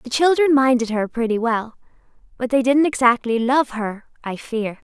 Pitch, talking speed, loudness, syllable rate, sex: 245 Hz, 170 wpm, -19 LUFS, 4.7 syllables/s, female